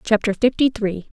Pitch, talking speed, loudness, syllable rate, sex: 220 Hz, 150 wpm, -20 LUFS, 5.0 syllables/s, female